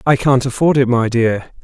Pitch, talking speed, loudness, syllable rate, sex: 125 Hz, 220 wpm, -15 LUFS, 4.9 syllables/s, male